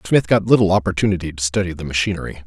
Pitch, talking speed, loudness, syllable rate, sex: 90 Hz, 195 wpm, -18 LUFS, 7.6 syllables/s, male